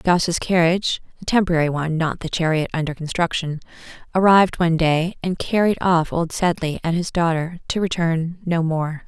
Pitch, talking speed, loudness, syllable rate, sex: 170 Hz, 160 wpm, -20 LUFS, 3.6 syllables/s, female